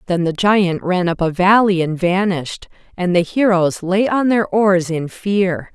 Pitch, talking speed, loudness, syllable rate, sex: 185 Hz, 190 wpm, -16 LUFS, 4.2 syllables/s, female